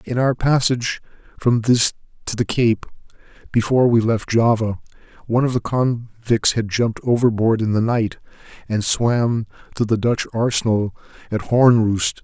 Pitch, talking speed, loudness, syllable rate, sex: 115 Hz, 150 wpm, -19 LUFS, 4.7 syllables/s, male